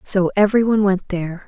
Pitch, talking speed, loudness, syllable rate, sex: 195 Hz, 205 wpm, -18 LUFS, 6.8 syllables/s, female